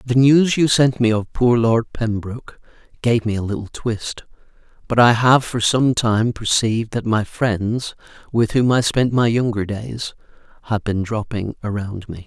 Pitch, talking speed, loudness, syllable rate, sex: 115 Hz, 175 wpm, -18 LUFS, 4.3 syllables/s, male